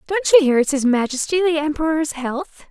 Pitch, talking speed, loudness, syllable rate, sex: 300 Hz, 200 wpm, -18 LUFS, 5.7 syllables/s, female